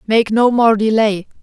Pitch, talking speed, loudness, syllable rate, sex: 220 Hz, 170 wpm, -14 LUFS, 4.3 syllables/s, female